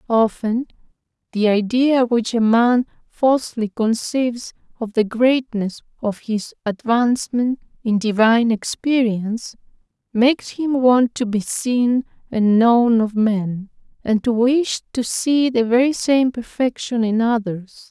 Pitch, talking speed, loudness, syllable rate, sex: 235 Hz, 125 wpm, -19 LUFS, 3.9 syllables/s, female